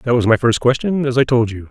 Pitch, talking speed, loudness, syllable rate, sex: 125 Hz, 315 wpm, -16 LUFS, 6.0 syllables/s, male